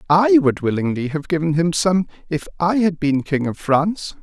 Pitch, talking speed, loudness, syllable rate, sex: 160 Hz, 200 wpm, -19 LUFS, 4.9 syllables/s, male